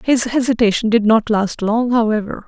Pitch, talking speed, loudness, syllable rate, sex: 225 Hz, 170 wpm, -16 LUFS, 5.1 syllables/s, female